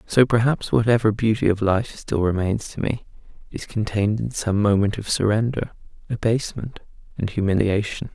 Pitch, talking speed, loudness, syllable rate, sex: 110 Hz, 145 wpm, -22 LUFS, 5.3 syllables/s, male